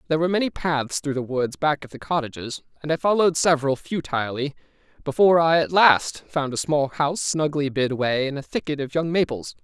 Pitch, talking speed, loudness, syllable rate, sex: 150 Hz, 205 wpm, -22 LUFS, 6.0 syllables/s, male